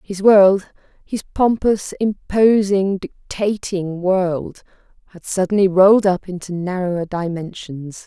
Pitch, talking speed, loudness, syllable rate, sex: 190 Hz, 105 wpm, -17 LUFS, 3.8 syllables/s, female